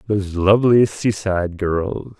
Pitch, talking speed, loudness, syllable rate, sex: 100 Hz, 110 wpm, -18 LUFS, 4.6 syllables/s, male